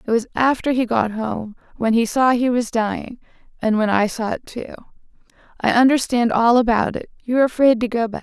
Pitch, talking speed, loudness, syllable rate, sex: 235 Hz, 195 wpm, -19 LUFS, 5.4 syllables/s, female